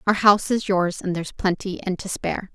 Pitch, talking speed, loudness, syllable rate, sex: 190 Hz, 235 wpm, -22 LUFS, 5.9 syllables/s, female